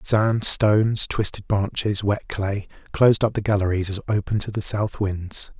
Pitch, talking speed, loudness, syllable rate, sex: 105 Hz, 160 wpm, -21 LUFS, 4.3 syllables/s, male